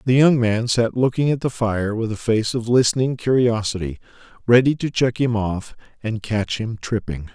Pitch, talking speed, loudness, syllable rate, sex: 115 Hz, 190 wpm, -20 LUFS, 4.8 syllables/s, male